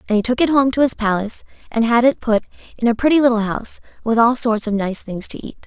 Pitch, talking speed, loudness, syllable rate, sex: 230 Hz, 265 wpm, -18 LUFS, 6.5 syllables/s, female